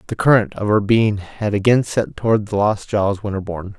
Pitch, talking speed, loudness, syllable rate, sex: 105 Hz, 205 wpm, -18 LUFS, 5.6 syllables/s, male